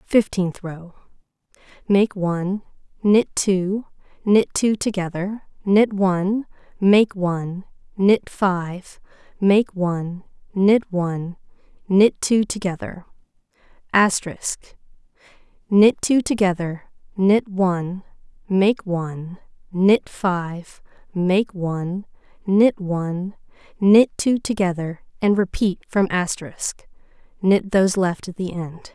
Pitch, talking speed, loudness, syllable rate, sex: 190 Hz, 100 wpm, -20 LUFS, 3.6 syllables/s, female